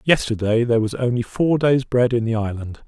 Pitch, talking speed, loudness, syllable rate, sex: 120 Hz, 210 wpm, -19 LUFS, 5.5 syllables/s, male